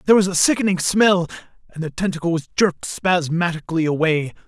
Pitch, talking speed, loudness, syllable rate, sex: 175 Hz, 145 wpm, -19 LUFS, 6.1 syllables/s, male